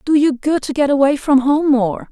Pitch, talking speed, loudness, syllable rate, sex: 280 Hz, 255 wpm, -15 LUFS, 5.0 syllables/s, female